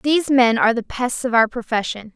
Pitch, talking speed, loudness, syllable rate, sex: 240 Hz, 225 wpm, -18 LUFS, 5.7 syllables/s, female